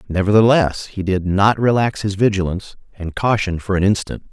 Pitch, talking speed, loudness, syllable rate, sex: 100 Hz, 165 wpm, -17 LUFS, 5.3 syllables/s, male